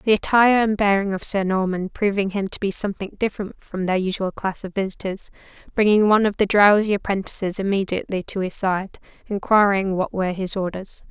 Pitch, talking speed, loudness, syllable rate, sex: 195 Hz, 185 wpm, -21 LUFS, 5.9 syllables/s, female